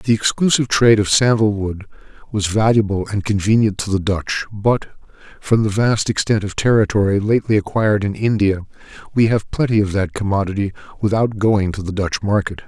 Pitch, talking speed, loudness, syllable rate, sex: 105 Hz, 165 wpm, -17 LUFS, 5.6 syllables/s, male